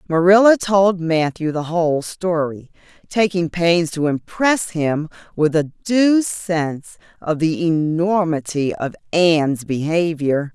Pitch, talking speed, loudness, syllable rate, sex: 165 Hz, 120 wpm, -18 LUFS, 3.8 syllables/s, female